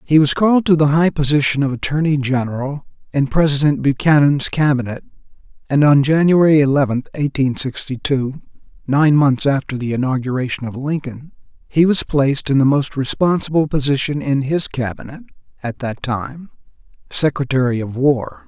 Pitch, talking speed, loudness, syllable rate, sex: 140 Hz, 145 wpm, -17 LUFS, 5.2 syllables/s, male